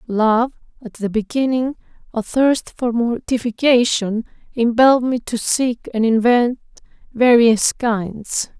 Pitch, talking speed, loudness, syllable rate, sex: 235 Hz, 105 wpm, -17 LUFS, 3.8 syllables/s, female